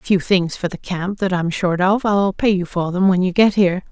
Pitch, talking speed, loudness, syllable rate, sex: 185 Hz, 290 wpm, -18 LUFS, 5.2 syllables/s, female